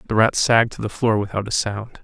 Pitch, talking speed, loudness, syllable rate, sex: 110 Hz, 265 wpm, -20 LUFS, 6.0 syllables/s, male